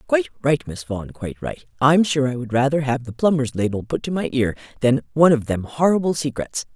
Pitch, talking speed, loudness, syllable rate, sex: 135 Hz, 220 wpm, -21 LUFS, 6.1 syllables/s, female